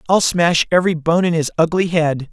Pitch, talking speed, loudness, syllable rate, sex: 165 Hz, 205 wpm, -16 LUFS, 5.4 syllables/s, male